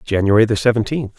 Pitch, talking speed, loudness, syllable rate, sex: 110 Hz, 150 wpm, -16 LUFS, 6.5 syllables/s, male